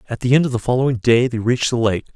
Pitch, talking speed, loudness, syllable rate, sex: 120 Hz, 305 wpm, -17 LUFS, 7.5 syllables/s, male